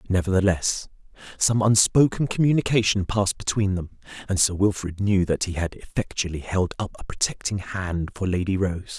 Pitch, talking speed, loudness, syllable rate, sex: 95 Hz, 155 wpm, -23 LUFS, 5.4 syllables/s, male